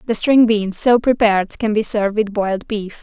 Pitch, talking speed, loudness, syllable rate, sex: 215 Hz, 220 wpm, -16 LUFS, 5.2 syllables/s, female